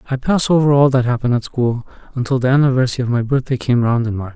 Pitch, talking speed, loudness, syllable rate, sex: 125 Hz, 250 wpm, -16 LUFS, 7.1 syllables/s, male